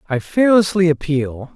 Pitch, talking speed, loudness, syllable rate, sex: 160 Hz, 115 wpm, -16 LUFS, 4.2 syllables/s, male